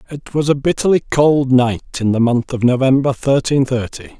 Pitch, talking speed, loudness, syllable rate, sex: 130 Hz, 185 wpm, -15 LUFS, 4.9 syllables/s, male